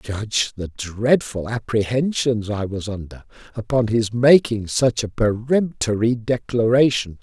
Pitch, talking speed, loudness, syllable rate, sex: 115 Hz, 115 wpm, -20 LUFS, 4.8 syllables/s, male